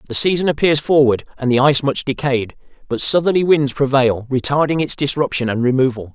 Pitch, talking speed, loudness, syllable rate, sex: 135 Hz, 175 wpm, -16 LUFS, 5.8 syllables/s, male